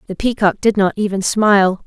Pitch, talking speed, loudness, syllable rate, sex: 200 Hz, 195 wpm, -15 LUFS, 5.4 syllables/s, female